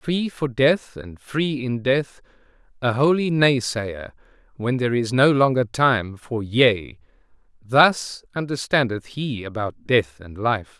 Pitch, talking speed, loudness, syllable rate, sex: 125 Hz, 140 wpm, -21 LUFS, 3.7 syllables/s, male